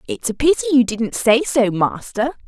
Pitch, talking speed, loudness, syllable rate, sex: 245 Hz, 195 wpm, -18 LUFS, 4.9 syllables/s, female